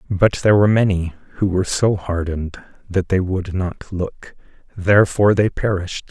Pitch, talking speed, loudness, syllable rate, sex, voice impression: 95 Hz, 155 wpm, -18 LUFS, 5.1 syllables/s, male, very masculine, very feminine, very adult-like, very old, very thick, relaxed, powerful, very weak, dark, soft, muffled, fluent, very cool, intellectual, slightly refreshing, sincere, very calm, very mature, very friendly, reassuring, very unique, elegant, very wild, sweet, lively, kind, slightly modest